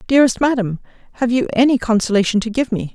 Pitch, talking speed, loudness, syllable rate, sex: 235 Hz, 185 wpm, -17 LUFS, 6.8 syllables/s, female